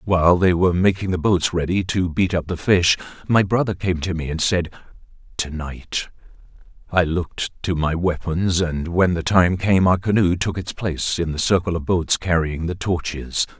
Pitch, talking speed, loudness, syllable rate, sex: 90 Hz, 195 wpm, -20 LUFS, 4.8 syllables/s, male